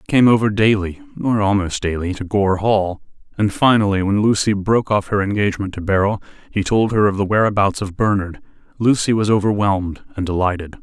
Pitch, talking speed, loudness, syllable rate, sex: 105 Hz, 170 wpm, -18 LUFS, 5.8 syllables/s, male